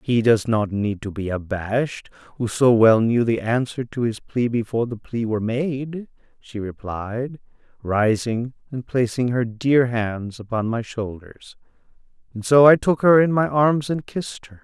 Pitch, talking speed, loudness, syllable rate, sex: 120 Hz, 175 wpm, -21 LUFS, 4.4 syllables/s, male